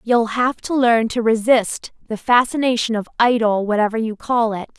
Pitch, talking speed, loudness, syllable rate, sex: 230 Hz, 175 wpm, -18 LUFS, 4.8 syllables/s, female